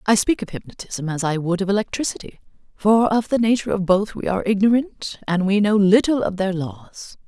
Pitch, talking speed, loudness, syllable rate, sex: 200 Hz, 205 wpm, -20 LUFS, 5.6 syllables/s, female